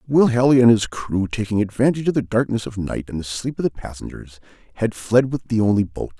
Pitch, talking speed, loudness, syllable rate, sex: 115 Hz, 235 wpm, -20 LUFS, 5.9 syllables/s, male